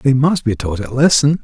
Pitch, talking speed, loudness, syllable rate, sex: 130 Hz, 250 wpm, -15 LUFS, 5.0 syllables/s, male